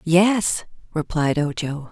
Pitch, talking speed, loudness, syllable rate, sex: 160 Hz, 95 wpm, -22 LUFS, 3.2 syllables/s, female